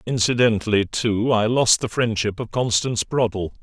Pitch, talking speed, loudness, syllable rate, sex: 110 Hz, 150 wpm, -20 LUFS, 5.0 syllables/s, male